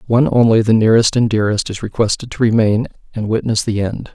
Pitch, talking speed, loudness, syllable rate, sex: 110 Hz, 205 wpm, -15 LUFS, 6.5 syllables/s, male